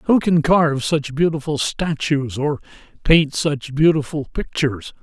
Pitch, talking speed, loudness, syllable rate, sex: 150 Hz, 130 wpm, -19 LUFS, 4.3 syllables/s, male